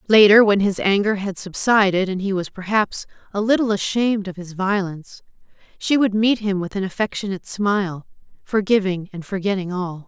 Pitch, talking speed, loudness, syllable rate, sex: 195 Hz, 165 wpm, -20 LUFS, 5.4 syllables/s, female